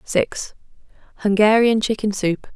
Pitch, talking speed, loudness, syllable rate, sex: 210 Hz, 70 wpm, -19 LUFS, 4.0 syllables/s, female